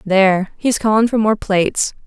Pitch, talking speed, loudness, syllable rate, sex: 205 Hz, 175 wpm, -16 LUFS, 5.0 syllables/s, female